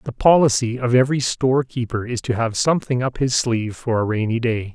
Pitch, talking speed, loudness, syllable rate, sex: 125 Hz, 200 wpm, -19 LUFS, 5.8 syllables/s, male